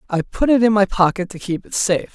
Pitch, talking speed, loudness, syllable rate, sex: 195 Hz, 280 wpm, -18 LUFS, 6.1 syllables/s, male